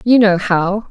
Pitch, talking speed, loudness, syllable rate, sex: 200 Hz, 200 wpm, -14 LUFS, 3.8 syllables/s, female